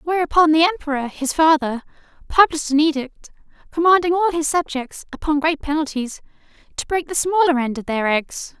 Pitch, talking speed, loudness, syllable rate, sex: 305 Hz, 160 wpm, -19 LUFS, 5.6 syllables/s, female